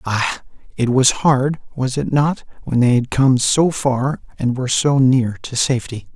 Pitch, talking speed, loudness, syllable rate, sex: 130 Hz, 185 wpm, -17 LUFS, 4.3 syllables/s, male